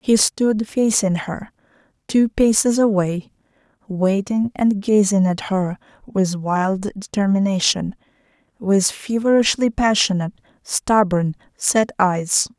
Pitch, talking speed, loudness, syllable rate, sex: 200 Hz, 100 wpm, -19 LUFS, 3.8 syllables/s, female